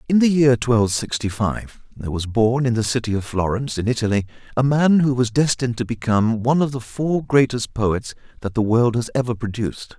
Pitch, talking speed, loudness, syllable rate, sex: 120 Hz, 210 wpm, -20 LUFS, 5.7 syllables/s, male